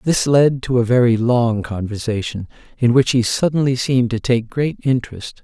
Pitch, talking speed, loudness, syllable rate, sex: 120 Hz, 175 wpm, -17 LUFS, 5.0 syllables/s, male